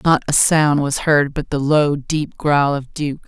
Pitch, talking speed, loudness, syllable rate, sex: 145 Hz, 220 wpm, -17 LUFS, 3.9 syllables/s, female